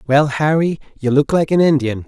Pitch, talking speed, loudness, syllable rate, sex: 145 Hz, 205 wpm, -16 LUFS, 5.3 syllables/s, male